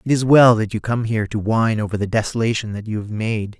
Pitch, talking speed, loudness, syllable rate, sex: 110 Hz, 265 wpm, -19 LUFS, 6.3 syllables/s, male